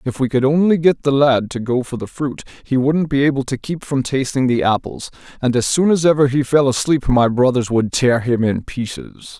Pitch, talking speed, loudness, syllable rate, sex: 135 Hz, 235 wpm, -17 LUFS, 5.3 syllables/s, male